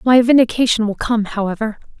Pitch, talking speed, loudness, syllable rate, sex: 225 Hz, 150 wpm, -16 LUFS, 5.9 syllables/s, female